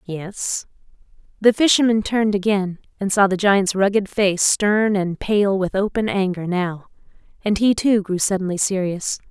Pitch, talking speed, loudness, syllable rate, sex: 200 Hz, 155 wpm, -19 LUFS, 4.4 syllables/s, female